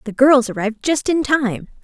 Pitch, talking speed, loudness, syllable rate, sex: 255 Hz, 195 wpm, -17 LUFS, 5.2 syllables/s, female